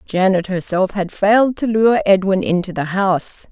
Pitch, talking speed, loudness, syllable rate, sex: 195 Hz, 170 wpm, -16 LUFS, 4.8 syllables/s, female